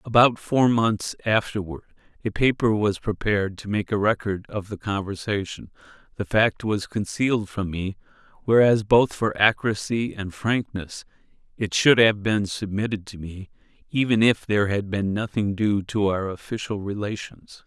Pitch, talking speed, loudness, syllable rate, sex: 105 Hz, 155 wpm, -23 LUFS, 4.7 syllables/s, male